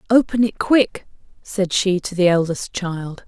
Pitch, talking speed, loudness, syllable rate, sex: 190 Hz, 165 wpm, -19 LUFS, 4.1 syllables/s, female